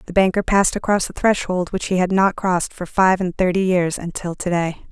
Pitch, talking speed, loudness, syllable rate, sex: 185 Hz, 230 wpm, -19 LUFS, 5.6 syllables/s, female